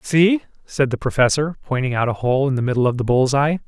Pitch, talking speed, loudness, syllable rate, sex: 135 Hz, 245 wpm, -19 LUFS, 5.8 syllables/s, male